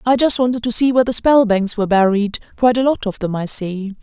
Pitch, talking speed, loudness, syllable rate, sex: 225 Hz, 240 wpm, -16 LUFS, 6.3 syllables/s, female